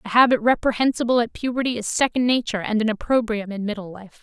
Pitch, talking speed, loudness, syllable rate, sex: 230 Hz, 200 wpm, -21 LUFS, 6.6 syllables/s, female